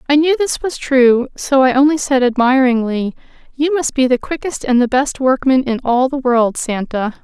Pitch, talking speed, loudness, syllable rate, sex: 260 Hz, 200 wpm, -15 LUFS, 4.8 syllables/s, female